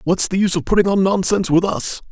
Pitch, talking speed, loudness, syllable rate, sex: 185 Hz, 255 wpm, -17 LUFS, 6.7 syllables/s, male